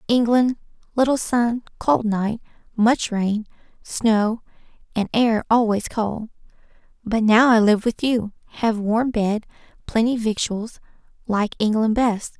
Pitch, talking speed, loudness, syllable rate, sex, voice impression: 225 Hz, 125 wpm, -20 LUFS, 3.8 syllables/s, female, very feminine, slightly young, adult-like, very thin, slightly relaxed, slightly weak, bright, soft, clear, fluent, slightly raspy, very cute, intellectual, very refreshing, sincere, calm, very friendly, very reassuring, unique, very elegant, very sweet, lively, kind, slightly modest, light